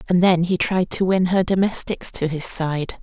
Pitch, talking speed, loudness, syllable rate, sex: 180 Hz, 220 wpm, -20 LUFS, 4.6 syllables/s, female